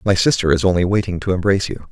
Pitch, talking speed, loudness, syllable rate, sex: 95 Hz, 250 wpm, -17 LUFS, 7.3 syllables/s, male